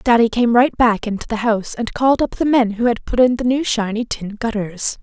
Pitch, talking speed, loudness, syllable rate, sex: 230 Hz, 250 wpm, -17 LUFS, 5.5 syllables/s, female